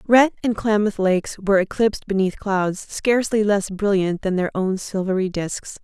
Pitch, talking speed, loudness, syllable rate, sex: 200 Hz, 165 wpm, -21 LUFS, 5.1 syllables/s, female